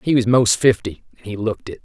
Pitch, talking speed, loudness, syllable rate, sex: 110 Hz, 260 wpm, -18 LUFS, 6.3 syllables/s, male